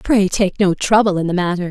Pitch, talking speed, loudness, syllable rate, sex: 190 Hz, 245 wpm, -16 LUFS, 5.4 syllables/s, female